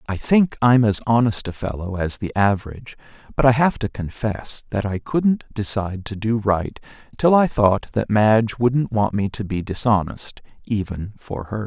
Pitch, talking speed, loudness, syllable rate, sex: 110 Hz, 185 wpm, -20 LUFS, 4.7 syllables/s, male